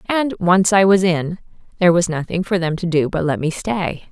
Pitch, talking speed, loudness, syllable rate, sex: 180 Hz, 235 wpm, -17 LUFS, 5.2 syllables/s, female